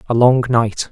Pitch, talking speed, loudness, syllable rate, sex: 120 Hz, 195 wpm, -15 LUFS, 4.5 syllables/s, male